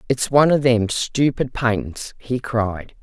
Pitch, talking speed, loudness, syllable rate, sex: 120 Hz, 160 wpm, -19 LUFS, 4.0 syllables/s, female